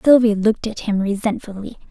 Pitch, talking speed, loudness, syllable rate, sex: 215 Hz, 155 wpm, -19 LUFS, 5.9 syllables/s, female